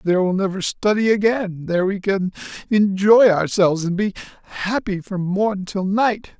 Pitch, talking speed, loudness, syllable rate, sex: 195 Hz, 160 wpm, -19 LUFS, 4.8 syllables/s, male